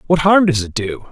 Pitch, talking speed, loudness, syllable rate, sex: 140 Hz, 270 wpm, -15 LUFS, 5.3 syllables/s, male